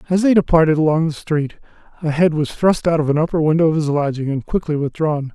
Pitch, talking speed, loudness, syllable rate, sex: 155 Hz, 235 wpm, -17 LUFS, 6.1 syllables/s, male